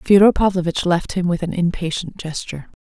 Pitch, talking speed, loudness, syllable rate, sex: 180 Hz, 170 wpm, -19 LUFS, 5.6 syllables/s, female